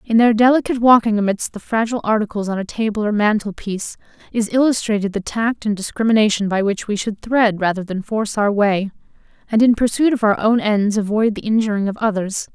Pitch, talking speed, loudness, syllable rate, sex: 215 Hz, 200 wpm, -18 LUFS, 6.0 syllables/s, female